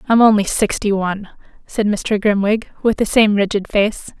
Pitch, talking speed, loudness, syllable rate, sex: 210 Hz, 170 wpm, -16 LUFS, 4.7 syllables/s, female